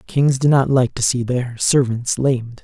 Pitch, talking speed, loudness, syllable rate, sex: 125 Hz, 205 wpm, -17 LUFS, 4.4 syllables/s, male